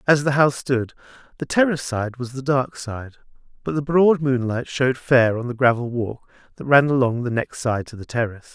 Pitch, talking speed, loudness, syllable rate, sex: 130 Hz, 210 wpm, -21 LUFS, 5.5 syllables/s, male